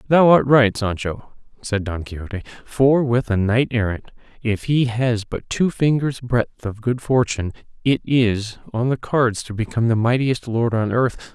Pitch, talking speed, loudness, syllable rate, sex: 120 Hz, 180 wpm, -20 LUFS, 4.5 syllables/s, male